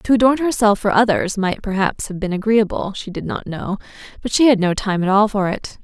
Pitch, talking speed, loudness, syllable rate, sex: 210 Hz, 215 wpm, -18 LUFS, 5.4 syllables/s, female